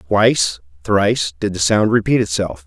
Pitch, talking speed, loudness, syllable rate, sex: 95 Hz, 160 wpm, -17 LUFS, 4.9 syllables/s, male